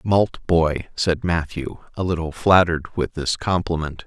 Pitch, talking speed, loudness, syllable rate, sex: 85 Hz, 135 wpm, -21 LUFS, 4.2 syllables/s, male